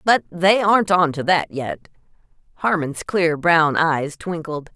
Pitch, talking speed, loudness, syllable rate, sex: 165 Hz, 140 wpm, -19 LUFS, 4.0 syllables/s, female